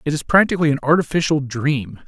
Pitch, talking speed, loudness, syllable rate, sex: 145 Hz, 175 wpm, -18 LUFS, 6.2 syllables/s, male